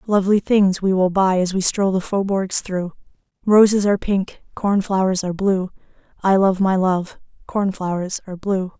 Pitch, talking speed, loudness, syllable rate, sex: 190 Hz, 175 wpm, -19 LUFS, 4.9 syllables/s, female